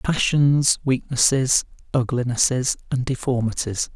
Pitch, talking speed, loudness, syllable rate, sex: 130 Hz, 75 wpm, -21 LUFS, 4.1 syllables/s, male